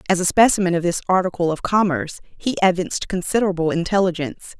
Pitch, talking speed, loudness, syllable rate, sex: 180 Hz, 155 wpm, -19 LUFS, 6.9 syllables/s, female